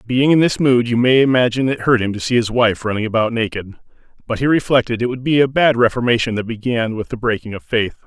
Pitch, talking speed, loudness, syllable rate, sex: 120 Hz, 230 wpm, -17 LUFS, 6.0 syllables/s, male